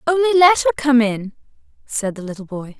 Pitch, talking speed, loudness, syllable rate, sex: 260 Hz, 195 wpm, -16 LUFS, 5.5 syllables/s, female